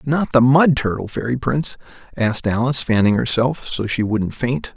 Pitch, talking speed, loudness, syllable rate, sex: 125 Hz, 175 wpm, -18 LUFS, 5.2 syllables/s, male